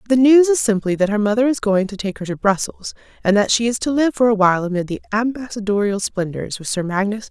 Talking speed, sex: 270 wpm, female